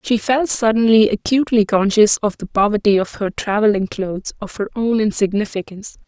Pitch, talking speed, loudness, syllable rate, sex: 210 Hz, 160 wpm, -17 LUFS, 5.6 syllables/s, female